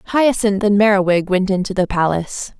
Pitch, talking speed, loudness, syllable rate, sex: 200 Hz, 160 wpm, -16 LUFS, 5.1 syllables/s, female